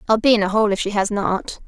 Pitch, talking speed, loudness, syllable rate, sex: 210 Hz, 320 wpm, -19 LUFS, 6.1 syllables/s, female